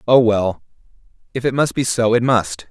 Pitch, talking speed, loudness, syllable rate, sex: 115 Hz, 200 wpm, -17 LUFS, 4.9 syllables/s, male